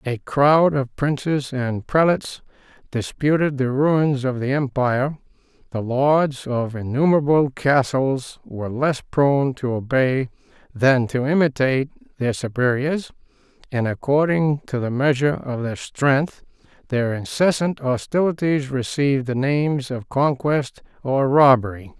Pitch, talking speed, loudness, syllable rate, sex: 135 Hz, 125 wpm, -20 LUFS, 4.3 syllables/s, male